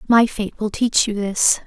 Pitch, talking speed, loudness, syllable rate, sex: 215 Hz, 215 wpm, -19 LUFS, 4.1 syllables/s, female